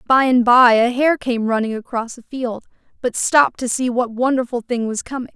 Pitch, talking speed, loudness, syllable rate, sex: 245 Hz, 215 wpm, -17 LUFS, 5.2 syllables/s, female